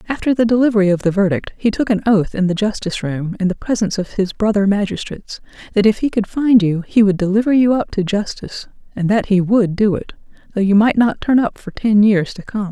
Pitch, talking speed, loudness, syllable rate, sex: 205 Hz, 240 wpm, -16 LUFS, 6.0 syllables/s, female